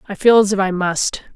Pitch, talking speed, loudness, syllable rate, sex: 195 Hz, 265 wpm, -16 LUFS, 5.4 syllables/s, female